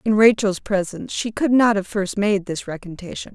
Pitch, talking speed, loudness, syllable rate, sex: 200 Hz, 195 wpm, -20 LUFS, 5.2 syllables/s, female